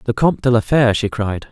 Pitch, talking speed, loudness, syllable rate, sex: 120 Hz, 280 wpm, -16 LUFS, 6.7 syllables/s, male